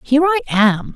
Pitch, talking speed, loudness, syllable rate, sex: 275 Hz, 190 wpm, -15 LUFS, 5.5 syllables/s, female